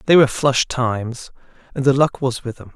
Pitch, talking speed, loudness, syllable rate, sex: 130 Hz, 220 wpm, -18 LUFS, 5.5 syllables/s, male